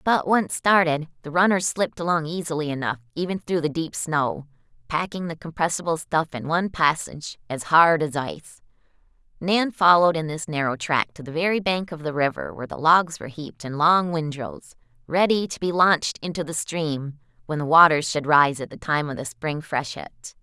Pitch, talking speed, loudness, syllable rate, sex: 155 Hz, 190 wpm, -22 LUFS, 5.4 syllables/s, female